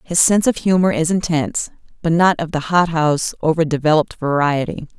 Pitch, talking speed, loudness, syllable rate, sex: 160 Hz, 155 wpm, -17 LUFS, 5.9 syllables/s, female